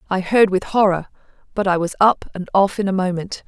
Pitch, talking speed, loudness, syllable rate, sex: 190 Hz, 225 wpm, -18 LUFS, 5.5 syllables/s, female